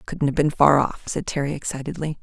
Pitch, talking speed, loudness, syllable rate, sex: 145 Hz, 245 wpm, -22 LUFS, 6.0 syllables/s, female